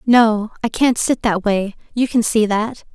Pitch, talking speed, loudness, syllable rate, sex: 225 Hz, 205 wpm, -17 LUFS, 4.1 syllables/s, female